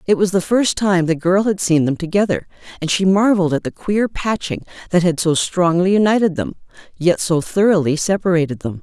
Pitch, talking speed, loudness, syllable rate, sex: 180 Hz, 195 wpm, -17 LUFS, 5.5 syllables/s, female